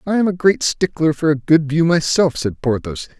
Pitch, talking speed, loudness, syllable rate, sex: 155 Hz, 225 wpm, -17 LUFS, 5.0 syllables/s, male